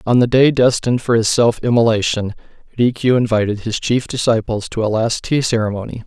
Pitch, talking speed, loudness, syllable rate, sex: 115 Hz, 180 wpm, -16 LUFS, 5.7 syllables/s, male